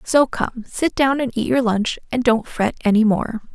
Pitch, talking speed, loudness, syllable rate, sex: 240 Hz, 220 wpm, -19 LUFS, 4.5 syllables/s, female